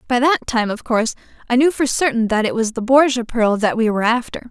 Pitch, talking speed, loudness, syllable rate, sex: 240 Hz, 255 wpm, -17 LUFS, 6.1 syllables/s, female